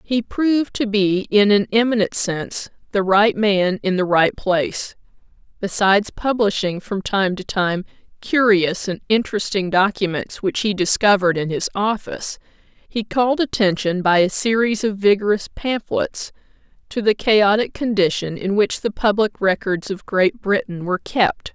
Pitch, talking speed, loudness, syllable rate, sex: 200 Hz, 150 wpm, -19 LUFS, 4.6 syllables/s, female